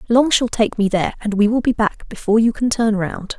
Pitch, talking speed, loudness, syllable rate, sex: 220 Hz, 265 wpm, -18 LUFS, 5.8 syllables/s, female